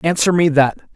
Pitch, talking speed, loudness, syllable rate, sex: 155 Hz, 190 wpm, -15 LUFS, 5.6 syllables/s, male